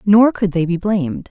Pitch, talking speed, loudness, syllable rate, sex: 190 Hz, 230 wpm, -16 LUFS, 5.0 syllables/s, female